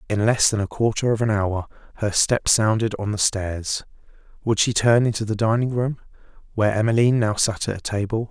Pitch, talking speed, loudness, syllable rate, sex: 110 Hz, 190 wpm, -21 LUFS, 5.4 syllables/s, male